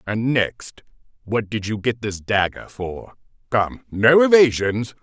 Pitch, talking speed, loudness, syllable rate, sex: 115 Hz, 145 wpm, -20 LUFS, 3.8 syllables/s, male